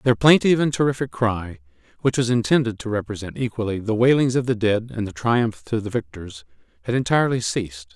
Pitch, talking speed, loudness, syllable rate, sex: 110 Hz, 190 wpm, -21 LUFS, 5.9 syllables/s, male